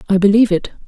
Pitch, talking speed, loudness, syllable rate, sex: 200 Hz, 205 wpm, -14 LUFS, 8.9 syllables/s, female